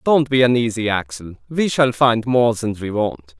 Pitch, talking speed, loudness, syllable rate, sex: 115 Hz, 195 wpm, -18 LUFS, 4.8 syllables/s, male